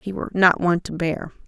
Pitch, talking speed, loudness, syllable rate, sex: 175 Hz, 245 wpm, -20 LUFS, 6.3 syllables/s, female